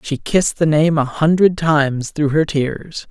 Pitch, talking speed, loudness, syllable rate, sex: 155 Hz, 195 wpm, -16 LUFS, 4.3 syllables/s, male